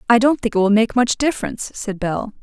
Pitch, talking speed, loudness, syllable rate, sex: 225 Hz, 250 wpm, -18 LUFS, 6.1 syllables/s, female